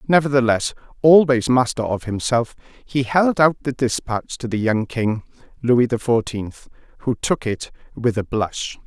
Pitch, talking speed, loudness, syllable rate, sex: 125 Hz, 155 wpm, -20 LUFS, 4.3 syllables/s, male